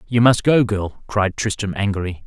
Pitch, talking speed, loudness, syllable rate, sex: 105 Hz, 185 wpm, -19 LUFS, 4.8 syllables/s, male